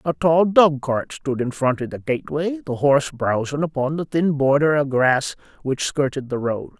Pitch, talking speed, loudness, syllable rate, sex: 145 Hz, 205 wpm, -20 LUFS, 4.7 syllables/s, male